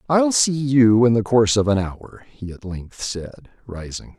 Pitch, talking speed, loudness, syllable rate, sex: 115 Hz, 200 wpm, -18 LUFS, 4.4 syllables/s, male